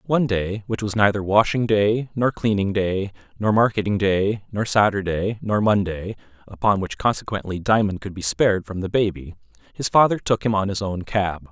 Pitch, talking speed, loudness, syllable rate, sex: 100 Hz, 170 wpm, -21 LUFS, 5.1 syllables/s, male